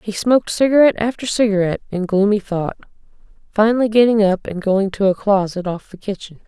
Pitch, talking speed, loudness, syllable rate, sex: 205 Hz, 175 wpm, -17 LUFS, 6.0 syllables/s, female